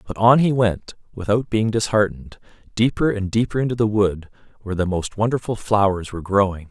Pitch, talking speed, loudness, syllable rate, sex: 105 Hz, 180 wpm, -20 LUFS, 5.8 syllables/s, male